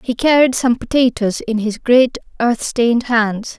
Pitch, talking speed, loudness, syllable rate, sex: 235 Hz, 165 wpm, -16 LUFS, 4.3 syllables/s, female